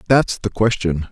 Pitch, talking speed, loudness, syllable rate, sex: 105 Hz, 160 wpm, -18 LUFS, 4.4 syllables/s, male